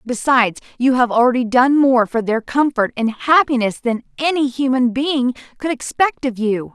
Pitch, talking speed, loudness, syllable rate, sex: 255 Hz, 170 wpm, -17 LUFS, 4.8 syllables/s, female